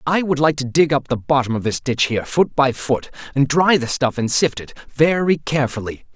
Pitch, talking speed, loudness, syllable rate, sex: 140 Hz, 215 wpm, -18 LUFS, 5.4 syllables/s, male